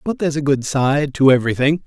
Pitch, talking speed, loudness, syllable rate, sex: 145 Hz, 225 wpm, -17 LUFS, 6.3 syllables/s, male